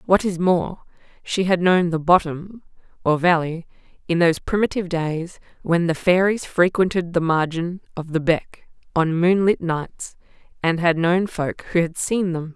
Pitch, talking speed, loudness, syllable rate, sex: 175 Hz, 160 wpm, -20 LUFS, 4.4 syllables/s, female